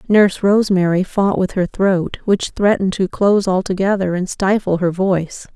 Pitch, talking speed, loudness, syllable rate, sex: 190 Hz, 160 wpm, -16 LUFS, 5.1 syllables/s, female